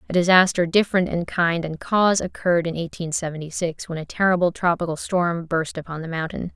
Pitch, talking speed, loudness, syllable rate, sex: 170 Hz, 190 wpm, -22 LUFS, 5.8 syllables/s, female